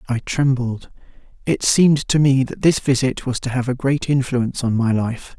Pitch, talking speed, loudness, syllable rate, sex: 130 Hz, 200 wpm, -19 LUFS, 4.9 syllables/s, male